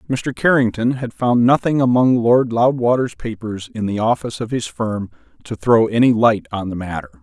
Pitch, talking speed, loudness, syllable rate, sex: 115 Hz, 185 wpm, -17 LUFS, 5.1 syllables/s, male